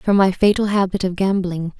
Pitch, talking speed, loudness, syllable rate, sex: 190 Hz, 200 wpm, -18 LUFS, 5.2 syllables/s, female